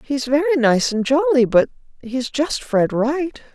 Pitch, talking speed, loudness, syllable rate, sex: 270 Hz, 170 wpm, -18 LUFS, 4.0 syllables/s, female